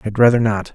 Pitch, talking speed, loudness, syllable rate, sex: 110 Hz, 240 wpm, -16 LUFS, 6.4 syllables/s, male